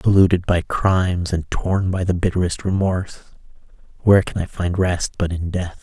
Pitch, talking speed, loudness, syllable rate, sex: 90 Hz, 175 wpm, -20 LUFS, 5.1 syllables/s, male